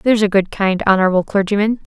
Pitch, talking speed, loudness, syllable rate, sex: 200 Hz, 190 wpm, -15 LUFS, 6.9 syllables/s, female